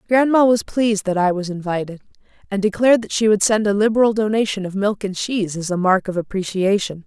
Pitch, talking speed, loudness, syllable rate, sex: 205 Hz, 210 wpm, -18 LUFS, 6.1 syllables/s, female